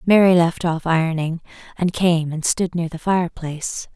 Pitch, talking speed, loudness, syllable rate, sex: 170 Hz, 180 wpm, -20 LUFS, 4.6 syllables/s, female